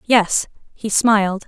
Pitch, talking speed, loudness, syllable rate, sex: 210 Hz, 120 wpm, -17 LUFS, 3.7 syllables/s, female